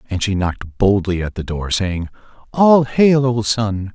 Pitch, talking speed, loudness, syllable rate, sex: 110 Hz, 180 wpm, -17 LUFS, 4.2 syllables/s, male